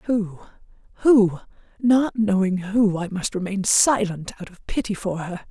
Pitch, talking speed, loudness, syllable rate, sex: 200 Hz, 130 wpm, -21 LUFS, 4.3 syllables/s, female